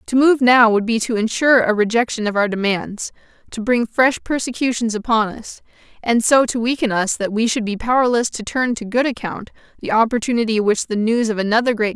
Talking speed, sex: 220 wpm, female